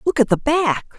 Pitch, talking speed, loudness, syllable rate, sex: 265 Hz, 245 wpm, -18 LUFS, 5.3 syllables/s, female